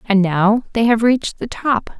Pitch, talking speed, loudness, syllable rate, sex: 220 Hz, 210 wpm, -17 LUFS, 4.5 syllables/s, female